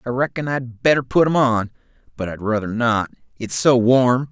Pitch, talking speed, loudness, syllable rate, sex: 125 Hz, 195 wpm, -19 LUFS, 4.9 syllables/s, male